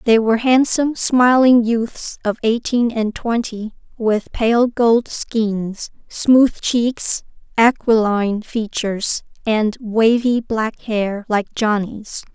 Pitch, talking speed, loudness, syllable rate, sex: 225 Hz, 110 wpm, -17 LUFS, 3.3 syllables/s, female